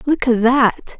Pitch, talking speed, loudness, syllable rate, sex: 250 Hz, 180 wpm, -15 LUFS, 3.5 syllables/s, female